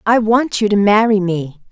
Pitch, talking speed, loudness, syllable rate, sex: 205 Hz, 210 wpm, -14 LUFS, 4.6 syllables/s, female